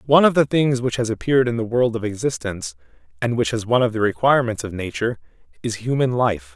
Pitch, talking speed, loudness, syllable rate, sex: 120 Hz, 220 wpm, -20 LUFS, 6.7 syllables/s, male